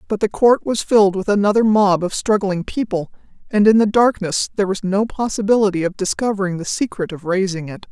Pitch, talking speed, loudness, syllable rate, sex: 200 Hz, 195 wpm, -17 LUFS, 5.8 syllables/s, female